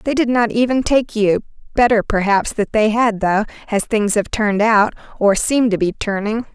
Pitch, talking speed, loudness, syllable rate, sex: 215 Hz, 200 wpm, -17 LUFS, 4.9 syllables/s, female